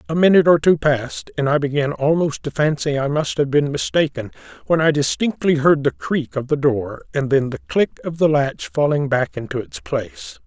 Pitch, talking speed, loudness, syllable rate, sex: 145 Hz, 210 wpm, -19 LUFS, 5.2 syllables/s, male